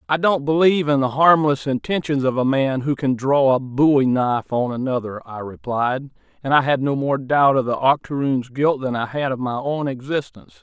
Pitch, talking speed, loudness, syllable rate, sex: 135 Hz, 210 wpm, -19 LUFS, 5.2 syllables/s, male